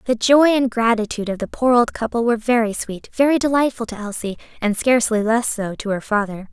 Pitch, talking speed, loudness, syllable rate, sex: 230 Hz, 210 wpm, -19 LUFS, 5.9 syllables/s, female